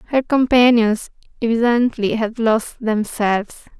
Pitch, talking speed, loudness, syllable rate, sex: 230 Hz, 95 wpm, -17 LUFS, 4.2 syllables/s, female